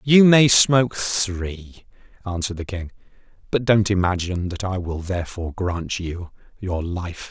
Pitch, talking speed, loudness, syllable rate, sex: 95 Hz, 150 wpm, -21 LUFS, 4.5 syllables/s, male